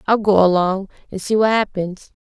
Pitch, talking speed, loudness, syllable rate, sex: 195 Hz, 190 wpm, -17 LUFS, 5.0 syllables/s, female